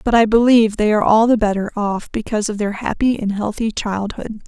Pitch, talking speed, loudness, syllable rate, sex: 215 Hz, 215 wpm, -17 LUFS, 5.8 syllables/s, female